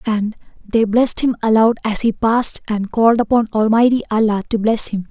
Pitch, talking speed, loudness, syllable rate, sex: 220 Hz, 190 wpm, -16 LUFS, 5.6 syllables/s, female